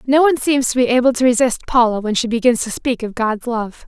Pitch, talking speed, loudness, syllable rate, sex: 240 Hz, 265 wpm, -16 LUFS, 6.0 syllables/s, female